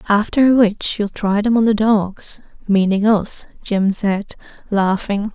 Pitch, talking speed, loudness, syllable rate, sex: 205 Hz, 135 wpm, -17 LUFS, 3.6 syllables/s, female